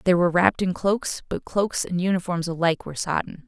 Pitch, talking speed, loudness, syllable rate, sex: 180 Hz, 205 wpm, -23 LUFS, 6.2 syllables/s, female